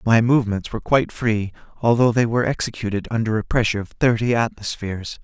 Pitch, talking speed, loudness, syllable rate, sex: 110 Hz, 170 wpm, -20 LUFS, 6.4 syllables/s, male